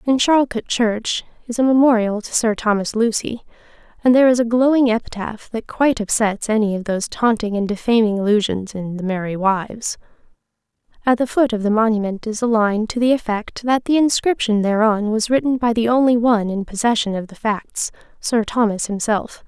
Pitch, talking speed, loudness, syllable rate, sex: 225 Hz, 185 wpm, -18 LUFS, 5.5 syllables/s, female